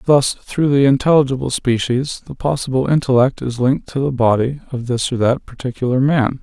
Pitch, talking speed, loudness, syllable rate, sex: 130 Hz, 175 wpm, -17 LUFS, 5.4 syllables/s, male